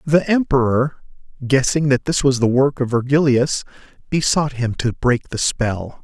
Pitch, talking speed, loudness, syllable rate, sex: 135 Hz, 160 wpm, -18 LUFS, 4.4 syllables/s, male